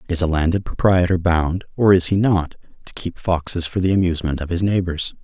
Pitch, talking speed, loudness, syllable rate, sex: 90 Hz, 205 wpm, -19 LUFS, 5.7 syllables/s, male